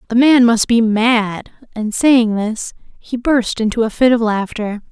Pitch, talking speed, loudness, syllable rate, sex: 230 Hz, 185 wpm, -15 LUFS, 4.0 syllables/s, female